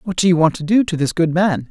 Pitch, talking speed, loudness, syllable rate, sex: 175 Hz, 355 wpm, -16 LUFS, 6.2 syllables/s, male